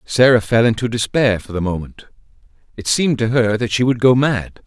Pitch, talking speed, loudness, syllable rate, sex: 115 Hz, 205 wpm, -16 LUFS, 5.4 syllables/s, male